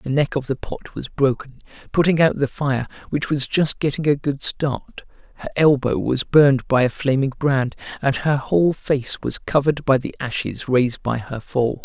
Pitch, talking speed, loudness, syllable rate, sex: 135 Hz, 200 wpm, -20 LUFS, 4.8 syllables/s, male